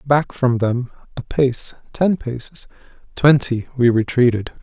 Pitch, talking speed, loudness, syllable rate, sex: 125 Hz, 130 wpm, -18 LUFS, 4.0 syllables/s, male